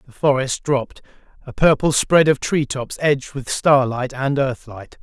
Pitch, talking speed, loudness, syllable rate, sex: 135 Hz, 155 wpm, -18 LUFS, 4.5 syllables/s, male